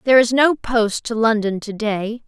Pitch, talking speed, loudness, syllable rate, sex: 225 Hz, 210 wpm, -18 LUFS, 4.7 syllables/s, female